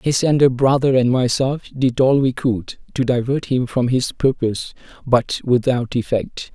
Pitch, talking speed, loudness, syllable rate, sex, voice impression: 125 Hz, 165 wpm, -18 LUFS, 4.4 syllables/s, male, masculine, adult-like, bright, soft, halting, sincere, calm, friendly, kind, modest